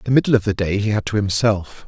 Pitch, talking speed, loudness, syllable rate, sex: 105 Hz, 290 wpm, -19 LUFS, 6.0 syllables/s, male